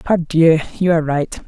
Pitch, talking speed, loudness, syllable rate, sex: 160 Hz, 165 wpm, -16 LUFS, 5.4 syllables/s, female